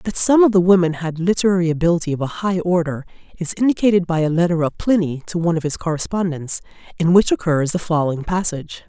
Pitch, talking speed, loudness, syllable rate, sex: 170 Hz, 205 wpm, -18 LUFS, 6.5 syllables/s, female